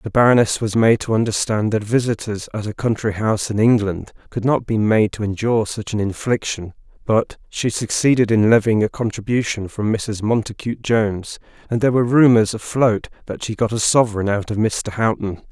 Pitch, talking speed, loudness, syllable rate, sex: 110 Hz, 185 wpm, -19 LUFS, 5.5 syllables/s, male